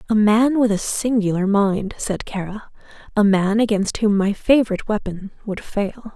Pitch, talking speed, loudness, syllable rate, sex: 210 Hz, 165 wpm, -19 LUFS, 4.8 syllables/s, female